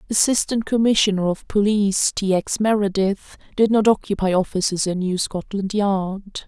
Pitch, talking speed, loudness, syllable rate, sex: 200 Hz, 140 wpm, -20 LUFS, 4.8 syllables/s, female